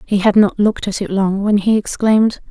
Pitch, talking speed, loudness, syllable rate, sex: 205 Hz, 240 wpm, -15 LUFS, 5.7 syllables/s, female